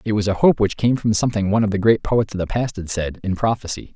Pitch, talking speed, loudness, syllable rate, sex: 105 Hz, 305 wpm, -20 LUFS, 6.6 syllables/s, male